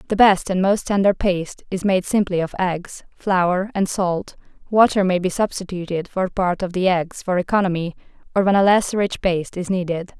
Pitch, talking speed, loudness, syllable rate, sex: 185 Hz, 195 wpm, -20 LUFS, 5.0 syllables/s, female